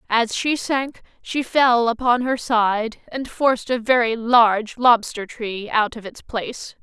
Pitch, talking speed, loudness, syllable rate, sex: 235 Hz, 165 wpm, -20 LUFS, 3.9 syllables/s, female